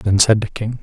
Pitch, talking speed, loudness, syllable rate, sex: 105 Hz, 290 wpm, -16 LUFS, 5.1 syllables/s, male